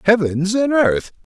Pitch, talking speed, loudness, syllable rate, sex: 195 Hz, 135 wpm, -17 LUFS, 3.9 syllables/s, male